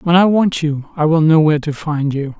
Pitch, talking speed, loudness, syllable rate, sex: 155 Hz, 275 wpm, -15 LUFS, 5.2 syllables/s, male